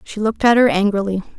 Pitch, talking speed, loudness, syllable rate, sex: 210 Hz, 215 wpm, -16 LUFS, 7.0 syllables/s, female